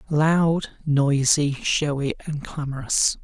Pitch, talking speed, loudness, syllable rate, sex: 145 Hz, 95 wpm, -22 LUFS, 3.2 syllables/s, male